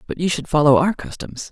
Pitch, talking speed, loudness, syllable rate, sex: 150 Hz, 240 wpm, -18 LUFS, 5.8 syllables/s, male